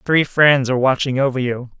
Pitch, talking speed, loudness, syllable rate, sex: 130 Hz, 200 wpm, -16 LUFS, 5.6 syllables/s, male